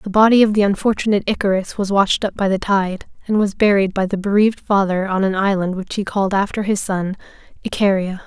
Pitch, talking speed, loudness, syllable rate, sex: 200 Hz, 210 wpm, -18 LUFS, 6.1 syllables/s, female